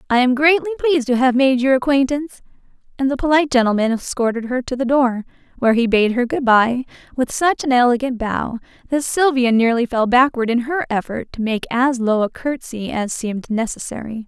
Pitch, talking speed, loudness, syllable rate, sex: 250 Hz, 195 wpm, -18 LUFS, 5.6 syllables/s, female